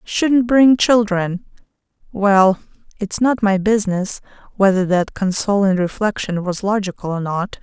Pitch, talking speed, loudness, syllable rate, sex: 200 Hz, 125 wpm, -17 LUFS, 4.3 syllables/s, female